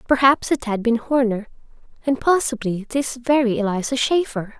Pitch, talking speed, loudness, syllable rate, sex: 245 Hz, 145 wpm, -20 LUFS, 5.1 syllables/s, female